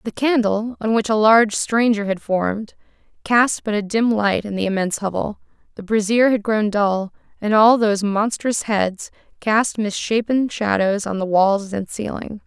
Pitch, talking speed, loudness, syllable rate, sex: 215 Hz, 175 wpm, -19 LUFS, 4.6 syllables/s, female